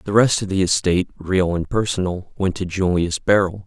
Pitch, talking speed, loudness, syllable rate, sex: 95 Hz, 195 wpm, -20 LUFS, 5.3 syllables/s, male